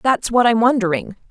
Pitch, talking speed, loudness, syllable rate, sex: 225 Hz, 185 wpm, -17 LUFS, 5.2 syllables/s, female